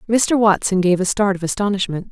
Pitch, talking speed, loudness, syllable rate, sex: 200 Hz, 200 wpm, -17 LUFS, 5.7 syllables/s, female